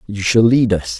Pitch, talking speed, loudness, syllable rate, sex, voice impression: 115 Hz, 240 wpm, -14 LUFS, 4.6 syllables/s, male, very masculine, gender-neutral, very adult-like, slightly thick, tensed, slightly powerful, bright, slightly soft, clear, fluent, slightly nasal, cool, intellectual, very refreshing, sincere, calm, friendly, reassuring, unique, elegant, slightly wild, sweet, lively, kind, modest